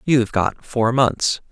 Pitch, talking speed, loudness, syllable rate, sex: 120 Hz, 160 wpm, -19 LUFS, 3.8 syllables/s, male